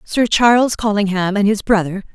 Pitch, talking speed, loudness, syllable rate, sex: 210 Hz, 170 wpm, -15 LUFS, 5.1 syllables/s, female